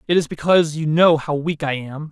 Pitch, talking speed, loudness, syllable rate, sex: 155 Hz, 255 wpm, -18 LUFS, 5.6 syllables/s, male